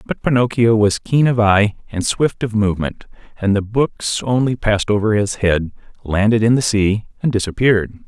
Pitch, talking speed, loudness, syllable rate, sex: 110 Hz, 180 wpm, -17 LUFS, 5.1 syllables/s, male